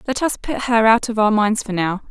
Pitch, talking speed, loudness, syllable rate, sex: 220 Hz, 285 wpm, -18 LUFS, 5.3 syllables/s, female